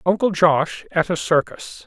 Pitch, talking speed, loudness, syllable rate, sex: 170 Hz, 160 wpm, -19 LUFS, 4.1 syllables/s, male